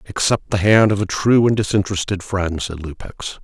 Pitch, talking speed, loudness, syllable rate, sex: 95 Hz, 190 wpm, -18 LUFS, 5.3 syllables/s, male